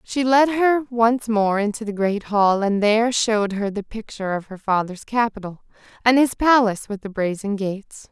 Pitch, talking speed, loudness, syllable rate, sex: 220 Hz, 190 wpm, -20 LUFS, 5.0 syllables/s, female